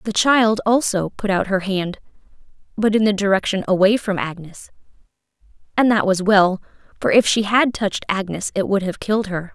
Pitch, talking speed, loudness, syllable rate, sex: 200 Hz, 175 wpm, -18 LUFS, 5.2 syllables/s, female